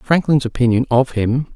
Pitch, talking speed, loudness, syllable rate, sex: 130 Hz, 155 wpm, -16 LUFS, 4.8 syllables/s, male